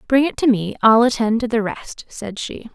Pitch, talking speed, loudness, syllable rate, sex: 230 Hz, 240 wpm, -18 LUFS, 4.8 syllables/s, female